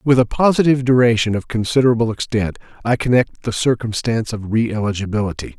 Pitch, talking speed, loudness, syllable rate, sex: 115 Hz, 150 wpm, -18 LUFS, 6.3 syllables/s, male